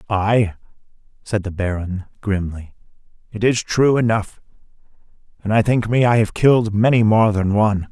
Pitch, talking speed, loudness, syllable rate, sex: 105 Hz, 150 wpm, -18 LUFS, 4.9 syllables/s, male